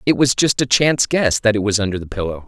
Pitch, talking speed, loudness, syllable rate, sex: 115 Hz, 290 wpm, -17 LUFS, 6.4 syllables/s, male